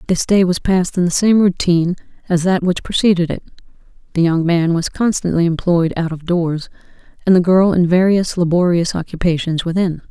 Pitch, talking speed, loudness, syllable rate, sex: 175 Hz, 180 wpm, -16 LUFS, 5.4 syllables/s, female